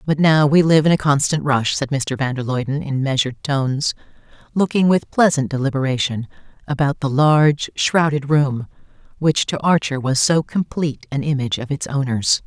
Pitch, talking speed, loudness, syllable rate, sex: 140 Hz, 175 wpm, -18 LUFS, 5.2 syllables/s, female